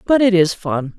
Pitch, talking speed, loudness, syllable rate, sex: 185 Hz, 245 wpm, -16 LUFS, 4.9 syllables/s, female